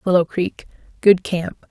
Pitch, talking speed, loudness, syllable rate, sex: 180 Hz, 105 wpm, -19 LUFS, 4.0 syllables/s, female